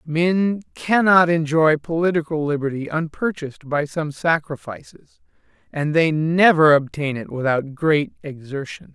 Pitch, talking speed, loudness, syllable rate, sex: 155 Hz, 115 wpm, -19 LUFS, 4.3 syllables/s, male